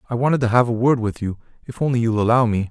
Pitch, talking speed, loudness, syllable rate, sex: 120 Hz, 265 wpm, -19 LUFS, 7.1 syllables/s, male